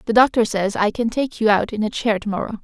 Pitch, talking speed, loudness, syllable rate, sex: 220 Hz, 295 wpm, -19 LUFS, 6.1 syllables/s, female